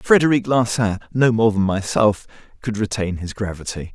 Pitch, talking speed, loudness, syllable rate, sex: 110 Hz, 150 wpm, -19 LUFS, 5.0 syllables/s, male